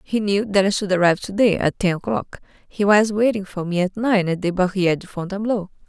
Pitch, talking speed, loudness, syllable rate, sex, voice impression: 195 Hz, 235 wpm, -20 LUFS, 6.0 syllables/s, female, very feminine, very adult-like, thin, slightly tensed, slightly powerful, bright, slightly hard, clear, fluent, raspy, cool, very intellectual, very refreshing, sincere, calm, very friendly, very reassuring, unique, elegant, wild, sweet, lively, kind, slightly intense, slightly light